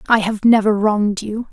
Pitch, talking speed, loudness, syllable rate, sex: 215 Hz, 195 wpm, -16 LUFS, 5.3 syllables/s, female